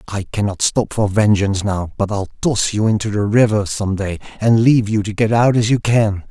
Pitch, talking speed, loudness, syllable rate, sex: 105 Hz, 230 wpm, -17 LUFS, 5.3 syllables/s, male